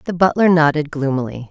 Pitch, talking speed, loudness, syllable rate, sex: 155 Hz, 160 wpm, -16 LUFS, 5.8 syllables/s, female